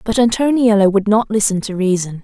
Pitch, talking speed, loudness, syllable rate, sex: 210 Hz, 190 wpm, -15 LUFS, 5.6 syllables/s, female